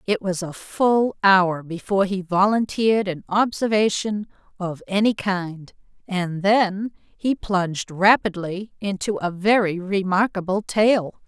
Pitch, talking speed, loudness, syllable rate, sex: 195 Hz, 120 wpm, -21 LUFS, 3.9 syllables/s, female